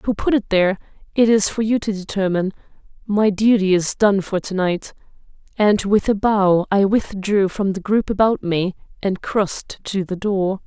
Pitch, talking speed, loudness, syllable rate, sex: 200 Hz, 185 wpm, -19 LUFS, 4.7 syllables/s, female